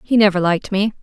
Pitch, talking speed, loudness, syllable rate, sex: 200 Hz, 235 wpm, -17 LUFS, 6.9 syllables/s, female